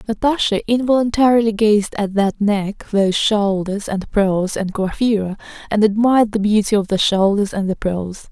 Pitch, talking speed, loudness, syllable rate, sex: 210 Hz, 160 wpm, -17 LUFS, 4.8 syllables/s, female